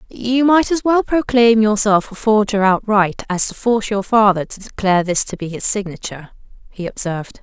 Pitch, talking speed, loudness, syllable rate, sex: 210 Hz, 185 wpm, -16 LUFS, 5.3 syllables/s, female